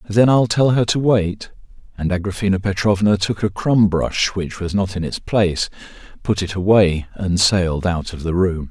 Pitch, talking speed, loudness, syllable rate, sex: 100 Hz, 195 wpm, -18 LUFS, 4.8 syllables/s, male